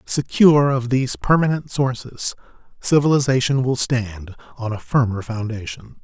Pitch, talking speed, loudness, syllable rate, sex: 125 Hz, 120 wpm, -19 LUFS, 4.8 syllables/s, male